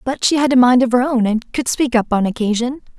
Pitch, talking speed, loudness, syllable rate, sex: 245 Hz, 280 wpm, -16 LUFS, 6.0 syllables/s, female